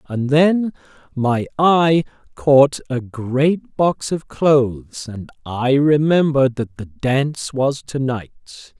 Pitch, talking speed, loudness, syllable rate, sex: 135 Hz, 130 wpm, -18 LUFS, 3.2 syllables/s, male